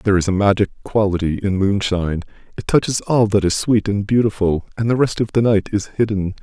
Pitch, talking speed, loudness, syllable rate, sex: 100 Hz, 215 wpm, -18 LUFS, 5.9 syllables/s, male